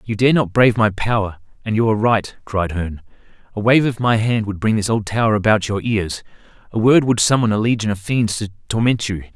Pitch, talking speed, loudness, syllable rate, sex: 110 Hz, 220 wpm, -18 LUFS, 5.8 syllables/s, male